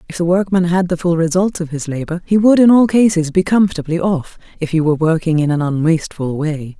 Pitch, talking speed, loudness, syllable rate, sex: 170 Hz, 230 wpm, -15 LUFS, 6.0 syllables/s, female